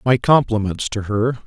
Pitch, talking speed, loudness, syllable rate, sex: 115 Hz, 165 wpm, -18 LUFS, 4.7 syllables/s, male